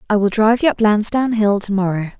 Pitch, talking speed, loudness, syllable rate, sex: 210 Hz, 220 wpm, -16 LUFS, 6.1 syllables/s, female